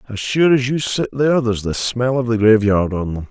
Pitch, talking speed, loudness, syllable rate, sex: 120 Hz, 255 wpm, -17 LUFS, 5.5 syllables/s, male